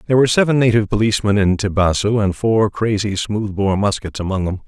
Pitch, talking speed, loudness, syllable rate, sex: 105 Hz, 195 wpm, -17 LUFS, 6.3 syllables/s, male